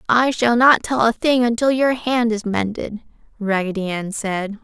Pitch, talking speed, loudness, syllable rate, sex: 225 Hz, 180 wpm, -18 LUFS, 4.4 syllables/s, female